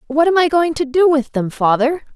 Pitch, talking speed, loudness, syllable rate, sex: 295 Hz, 250 wpm, -15 LUFS, 5.2 syllables/s, female